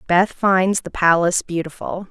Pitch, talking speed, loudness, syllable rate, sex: 180 Hz, 145 wpm, -18 LUFS, 4.6 syllables/s, female